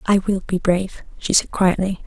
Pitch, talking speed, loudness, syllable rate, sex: 190 Hz, 205 wpm, -19 LUFS, 5.2 syllables/s, female